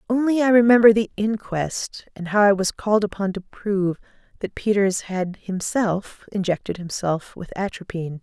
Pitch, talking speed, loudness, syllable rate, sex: 200 Hz, 155 wpm, -21 LUFS, 4.9 syllables/s, female